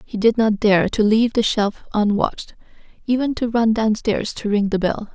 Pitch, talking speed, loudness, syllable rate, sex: 215 Hz, 200 wpm, -19 LUFS, 4.9 syllables/s, female